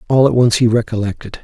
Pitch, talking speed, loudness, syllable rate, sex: 115 Hz, 210 wpm, -14 LUFS, 6.5 syllables/s, male